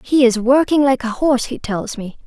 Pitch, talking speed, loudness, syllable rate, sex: 250 Hz, 240 wpm, -16 LUFS, 5.2 syllables/s, female